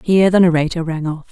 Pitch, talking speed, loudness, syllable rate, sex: 170 Hz, 230 wpm, -15 LUFS, 6.7 syllables/s, female